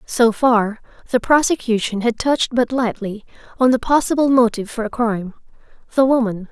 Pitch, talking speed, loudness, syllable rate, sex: 235 Hz, 145 wpm, -18 LUFS, 5.5 syllables/s, female